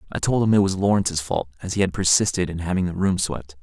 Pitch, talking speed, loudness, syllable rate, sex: 90 Hz, 265 wpm, -21 LUFS, 6.5 syllables/s, male